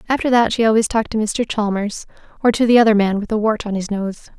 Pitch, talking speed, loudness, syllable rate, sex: 220 Hz, 260 wpm, -17 LUFS, 6.3 syllables/s, female